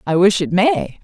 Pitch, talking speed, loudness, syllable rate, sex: 195 Hz, 235 wpm, -15 LUFS, 4.4 syllables/s, female